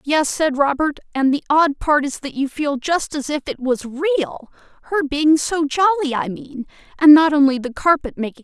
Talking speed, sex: 205 wpm, female